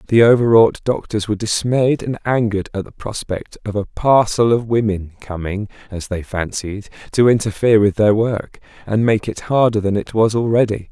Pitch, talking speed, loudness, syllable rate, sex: 110 Hz, 165 wpm, -17 LUFS, 5.1 syllables/s, male